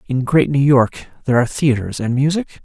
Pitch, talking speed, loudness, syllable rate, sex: 135 Hz, 205 wpm, -16 LUFS, 6.1 syllables/s, male